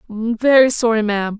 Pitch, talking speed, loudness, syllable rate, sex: 225 Hz, 130 wpm, -15 LUFS, 5.0 syllables/s, female